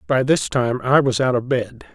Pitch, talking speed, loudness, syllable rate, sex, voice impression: 130 Hz, 245 wpm, -19 LUFS, 4.8 syllables/s, male, masculine, very adult-like, very old, thick, relaxed, weak, slightly bright, hard, muffled, slightly fluent, raspy, cool, intellectual, sincere, slightly calm, very mature, slightly friendly, slightly reassuring, very unique, slightly elegant, very wild, slightly lively, strict, slightly intense, slightly sharp